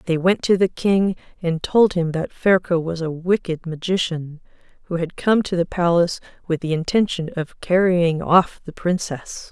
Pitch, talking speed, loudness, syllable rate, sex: 175 Hz, 175 wpm, -20 LUFS, 4.6 syllables/s, female